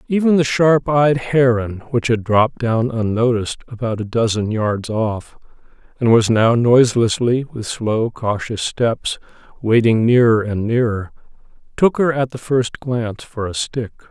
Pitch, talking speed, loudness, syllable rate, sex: 120 Hz, 155 wpm, -17 LUFS, 4.4 syllables/s, male